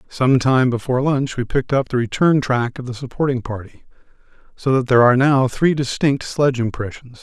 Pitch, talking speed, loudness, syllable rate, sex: 130 Hz, 190 wpm, -18 LUFS, 5.7 syllables/s, male